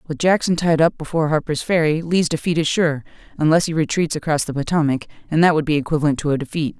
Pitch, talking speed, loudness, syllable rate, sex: 160 Hz, 220 wpm, -19 LUFS, 6.5 syllables/s, female